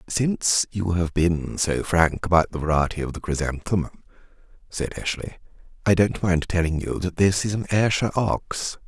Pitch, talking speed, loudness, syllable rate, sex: 90 Hz, 170 wpm, -23 LUFS, 5.0 syllables/s, male